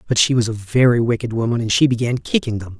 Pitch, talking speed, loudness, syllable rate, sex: 120 Hz, 260 wpm, -18 LUFS, 6.5 syllables/s, male